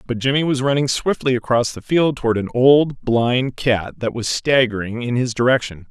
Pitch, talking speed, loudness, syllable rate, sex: 125 Hz, 195 wpm, -18 LUFS, 4.9 syllables/s, male